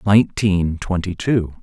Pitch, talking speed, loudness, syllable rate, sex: 95 Hz, 110 wpm, -19 LUFS, 4.2 syllables/s, male